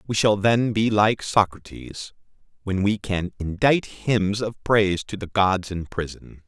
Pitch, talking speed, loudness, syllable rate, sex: 100 Hz, 165 wpm, -22 LUFS, 4.2 syllables/s, male